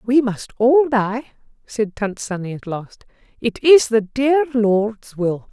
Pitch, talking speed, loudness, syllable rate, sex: 230 Hz, 165 wpm, -18 LUFS, 3.5 syllables/s, female